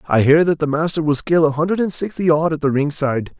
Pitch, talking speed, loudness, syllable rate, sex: 155 Hz, 280 wpm, -17 LUFS, 6.3 syllables/s, male